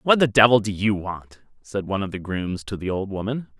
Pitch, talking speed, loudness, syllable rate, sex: 105 Hz, 250 wpm, -22 LUFS, 5.5 syllables/s, male